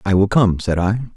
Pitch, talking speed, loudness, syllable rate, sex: 100 Hz, 260 wpm, -17 LUFS, 5.3 syllables/s, male